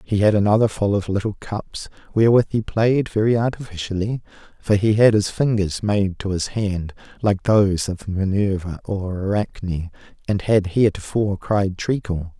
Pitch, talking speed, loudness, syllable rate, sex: 100 Hz, 155 wpm, -20 LUFS, 4.8 syllables/s, male